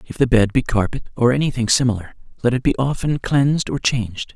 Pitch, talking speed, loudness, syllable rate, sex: 125 Hz, 205 wpm, -19 LUFS, 5.9 syllables/s, male